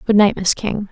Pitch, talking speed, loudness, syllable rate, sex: 200 Hz, 265 wpm, -16 LUFS, 5.1 syllables/s, female